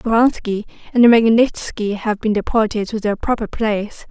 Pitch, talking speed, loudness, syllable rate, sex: 220 Hz, 145 wpm, -17 LUFS, 4.8 syllables/s, female